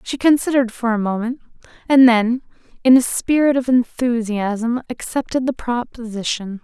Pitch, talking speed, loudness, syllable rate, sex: 240 Hz, 135 wpm, -18 LUFS, 4.9 syllables/s, female